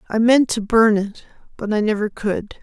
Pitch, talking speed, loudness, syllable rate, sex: 215 Hz, 160 wpm, -18 LUFS, 4.8 syllables/s, female